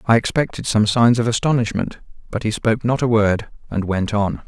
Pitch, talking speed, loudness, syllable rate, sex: 110 Hz, 200 wpm, -19 LUFS, 5.5 syllables/s, male